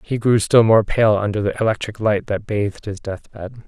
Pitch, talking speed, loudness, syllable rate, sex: 105 Hz, 210 wpm, -18 LUFS, 5.2 syllables/s, male